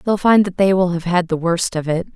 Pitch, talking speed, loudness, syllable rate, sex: 180 Hz, 305 wpm, -17 LUFS, 5.6 syllables/s, female